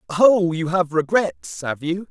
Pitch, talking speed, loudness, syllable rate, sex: 165 Hz, 170 wpm, -20 LUFS, 3.7 syllables/s, male